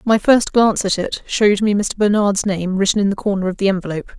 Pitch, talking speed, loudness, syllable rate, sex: 200 Hz, 245 wpm, -17 LUFS, 6.2 syllables/s, female